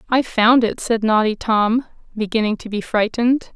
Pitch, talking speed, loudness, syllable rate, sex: 225 Hz, 170 wpm, -18 LUFS, 4.9 syllables/s, female